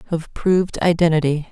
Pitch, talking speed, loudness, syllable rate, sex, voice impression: 165 Hz, 120 wpm, -18 LUFS, 5.6 syllables/s, female, feminine, adult-like, relaxed, slightly dark, soft, fluent, slightly raspy, intellectual, calm, friendly, reassuring, slightly kind, modest